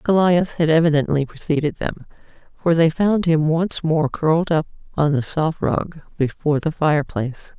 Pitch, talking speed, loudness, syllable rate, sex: 155 Hz, 160 wpm, -19 LUFS, 5.1 syllables/s, female